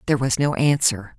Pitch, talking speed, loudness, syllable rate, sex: 130 Hz, 200 wpm, -20 LUFS, 5.8 syllables/s, female